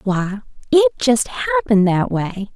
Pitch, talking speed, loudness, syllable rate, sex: 200 Hz, 140 wpm, -17 LUFS, 4.1 syllables/s, female